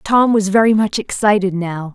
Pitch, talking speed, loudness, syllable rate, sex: 200 Hz, 185 wpm, -15 LUFS, 4.9 syllables/s, female